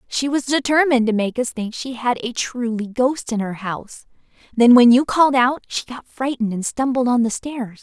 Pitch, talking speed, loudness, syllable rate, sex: 245 Hz, 215 wpm, -19 LUFS, 5.2 syllables/s, female